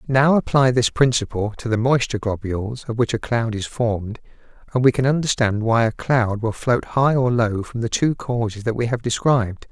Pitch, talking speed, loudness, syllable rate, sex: 120 Hz, 210 wpm, -20 LUFS, 5.2 syllables/s, male